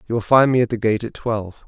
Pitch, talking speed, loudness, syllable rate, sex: 115 Hz, 320 wpm, -19 LUFS, 6.7 syllables/s, male